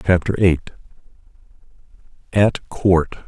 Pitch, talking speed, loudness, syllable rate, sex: 90 Hz, 75 wpm, -18 LUFS, 3.5 syllables/s, male